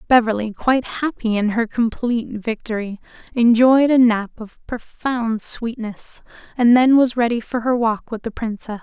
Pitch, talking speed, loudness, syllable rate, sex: 230 Hz, 155 wpm, -19 LUFS, 4.6 syllables/s, female